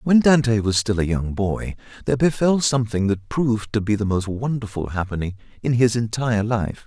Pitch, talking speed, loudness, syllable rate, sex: 115 Hz, 190 wpm, -21 LUFS, 5.5 syllables/s, male